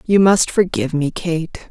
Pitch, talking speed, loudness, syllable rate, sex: 165 Hz, 175 wpm, -17 LUFS, 4.7 syllables/s, female